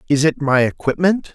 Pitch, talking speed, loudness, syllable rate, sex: 150 Hz, 180 wpm, -17 LUFS, 5.1 syllables/s, male